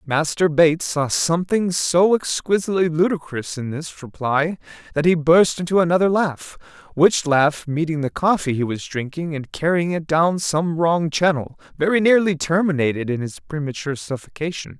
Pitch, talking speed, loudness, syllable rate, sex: 160 Hz, 155 wpm, -20 LUFS, 5.0 syllables/s, male